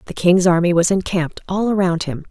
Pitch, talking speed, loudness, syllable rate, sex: 180 Hz, 210 wpm, -17 LUFS, 5.9 syllables/s, female